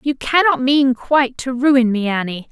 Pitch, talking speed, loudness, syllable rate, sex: 260 Hz, 190 wpm, -16 LUFS, 4.6 syllables/s, female